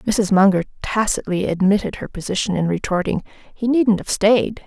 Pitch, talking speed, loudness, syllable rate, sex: 200 Hz, 155 wpm, -19 LUFS, 4.9 syllables/s, female